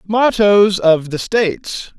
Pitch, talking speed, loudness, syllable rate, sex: 195 Hz, 120 wpm, -14 LUFS, 3.3 syllables/s, male